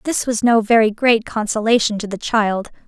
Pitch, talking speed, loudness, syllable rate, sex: 220 Hz, 190 wpm, -17 LUFS, 5.0 syllables/s, female